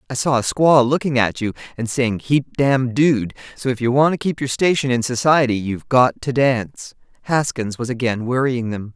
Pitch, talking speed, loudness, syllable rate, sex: 130 Hz, 210 wpm, -18 LUFS, 5.1 syllables/s, female